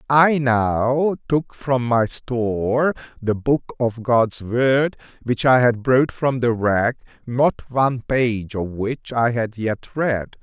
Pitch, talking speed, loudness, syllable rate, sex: 125 Hz, 155 wpm, -20 LUFS, 3.2 syllables/s, male